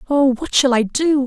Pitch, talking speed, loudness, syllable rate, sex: 270 Hz, 235 wpm, -16 LUFS, 4.7 syllables/s, female